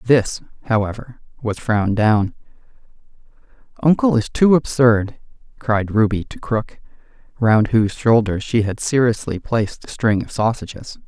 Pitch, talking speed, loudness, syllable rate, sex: 115 Hz, 130 wpm, -18 LUFS, 4.6 syllables/s, male